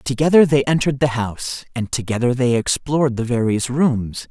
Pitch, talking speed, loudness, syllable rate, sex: 130 Hz, 165 wpm, -18 LUFS, 5.4 syllables/s, male